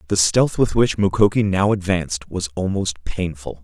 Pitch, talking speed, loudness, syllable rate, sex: 95 Hz, 165 wpm, -19 LUFS, 4.8 syllables/s, male